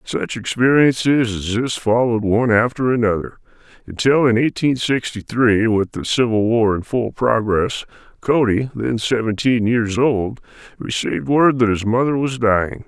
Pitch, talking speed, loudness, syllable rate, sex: 115 Hz, 150 wpm, -18 LUFS, 4.6 syllables/s, male